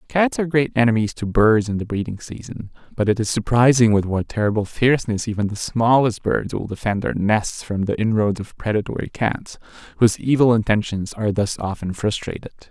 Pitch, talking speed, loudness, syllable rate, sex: 110 Hz, 185 wpm, -20 LUFS, 5.6 syllables/s, male